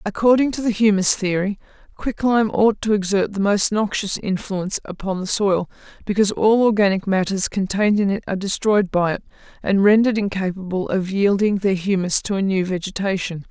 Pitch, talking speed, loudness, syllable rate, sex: 200 Hz, 175 wpm, -19 LUFS, 5.5 syllables/s, female